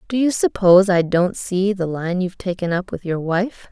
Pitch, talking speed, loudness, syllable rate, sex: 185 Hz, 225 wpm, -19 LUFS, 5.1 syllables/s, female